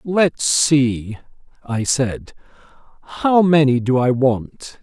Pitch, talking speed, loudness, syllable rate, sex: 135 Hz, 110 wpm, -17 LUFS, 3.0 syllables/s, male